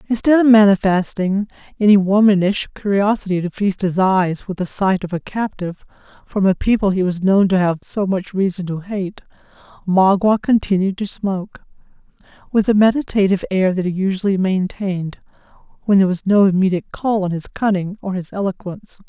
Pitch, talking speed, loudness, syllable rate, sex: 195 Hz, 165 wpm, -17 LUFS, 5.5 syllables/s, female